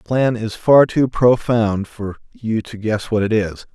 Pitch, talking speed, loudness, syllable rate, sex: 110 Hz, 210 wpm, -17 LUFS, 4.2 syllables/s, male